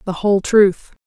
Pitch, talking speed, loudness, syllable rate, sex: 195 Hz, 170 wpm, -15 LUFS, 5.0 syllables/s, female